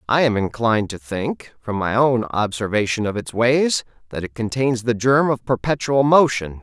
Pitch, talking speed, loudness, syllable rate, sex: 115 Hz, 180 wpm, -19 LUFS, 4.7 syllables/s, male